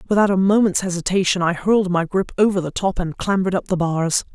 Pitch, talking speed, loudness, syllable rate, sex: 185 Hz, 220 wpm, -19 LUFS, 6.2 syllables/s, female